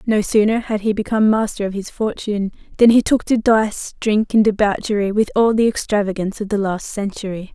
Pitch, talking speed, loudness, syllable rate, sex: 210 Hz, 200 wpm, -18 LUFS, 5.7 syllables/s, female